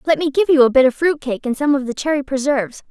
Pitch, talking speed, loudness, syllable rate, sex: 275 Hz, 310 wpm, -17 LUFS, 6.6 syllables/s, female